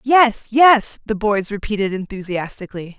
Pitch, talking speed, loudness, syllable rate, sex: 215 Hz, 120 wpm, -17 LUFS, 4.7 syllables/s, female